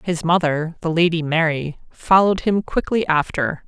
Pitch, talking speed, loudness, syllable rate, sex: 165 Hz, 145 wpm, -19 LUFS, 4.7 syllables/s, female